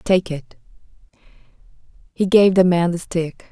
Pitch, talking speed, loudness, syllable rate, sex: 175 Hz, 135 wpm, -18 LUFS, 4.4 syllables/s, female